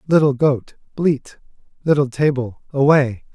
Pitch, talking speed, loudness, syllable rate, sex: 140 Hz, 110 wpm, -18 LUFS, 4.2 syllables/s, male